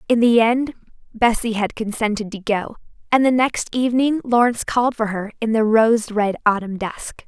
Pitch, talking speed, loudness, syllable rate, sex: 225 Hz, 180 wpm, -19 LUFS, 5.1 syllables/s, female